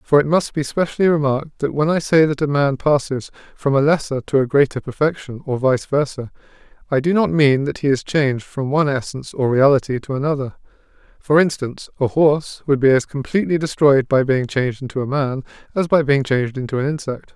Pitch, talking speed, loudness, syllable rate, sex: 140 Hz, 210 wpm, -18 LUFS, 5.9 syllables/s, male